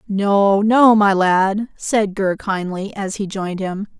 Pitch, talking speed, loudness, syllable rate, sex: 200 Hz, 165 wpm, -17 LUFS, 3.6 syllables/s, female